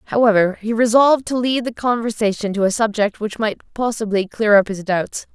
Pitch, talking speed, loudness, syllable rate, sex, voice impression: 220 Hz, 190 wpm, -18 LUFS, 5.3 syllables/s, female, very feminine, adult-like, slightly clear, intellectual, slightly lively